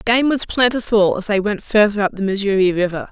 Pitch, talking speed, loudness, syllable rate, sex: 210 Hz, 210 wpm, -17 LUFS, 5.7 syllables/s, female